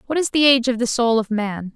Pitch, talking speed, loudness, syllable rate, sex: 240 Hz, 310 wpm, -18 LUFS, 6.3 syllables/s, female